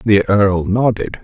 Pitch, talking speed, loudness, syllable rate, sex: 100 Hz, 145 wpm, -15 LUFS, 3.7 syllables/s, male